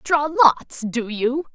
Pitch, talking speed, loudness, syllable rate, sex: 270 Hz, 155 wpm, -20 LUFS, 2.9 syllables/s, female